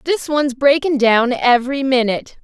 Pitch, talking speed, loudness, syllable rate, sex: 265 Hz, 175 wpm, -15 LUFS, 5.7 syllables/s, female